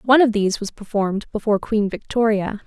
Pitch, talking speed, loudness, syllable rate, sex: 215 Hz, 180 wpm, -20 LUFS, 6.5 syllables/s, female